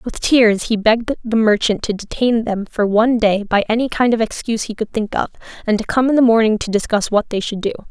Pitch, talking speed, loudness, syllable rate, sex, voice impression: 220 Hz, 250 wpm, -17 LUFS, 5.8 syllables/s, female, very feminine, young, slightly adult-like, tensed, slightly powerful, bright, slightly soft, clear, very fluent, slightly raspy, very cute, intellectual, very refreshing, very sincere, slightly calm, friendly, reassuring, very unique, very elegant, wild, very sweet, lively, kind, intense, slightly sharp, slightly modest, very light